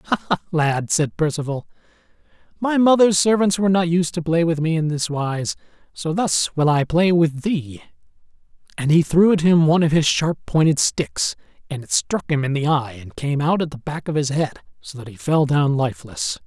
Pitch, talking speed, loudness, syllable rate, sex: 155 Hz, 210 wpm, -19 LUFS, 5.1 syllables/s, male